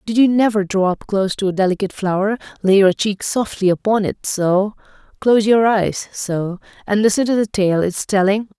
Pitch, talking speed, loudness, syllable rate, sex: 200 Hz, 180 wpm, -17 LUFS, 5.3 syllables/s, female